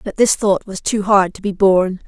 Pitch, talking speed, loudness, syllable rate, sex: 195 Hz, 260 wpm, -16 LUFS, 5.2 syllables/s, female